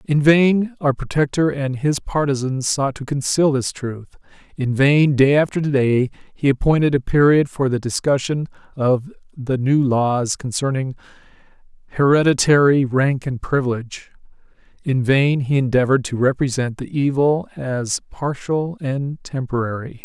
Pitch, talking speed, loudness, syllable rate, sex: 135 Hz, 135 wpm, -19 LUFS, 4.4 syllables/s, male